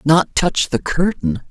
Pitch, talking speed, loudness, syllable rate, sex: 150 Hz, 160 wpm, -18 LUFS, 3.7 syllables/s, female